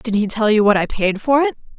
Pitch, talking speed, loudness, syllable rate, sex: 225 Hz, 305 wpm, -17 LUFS, 5.8 syllables/s, female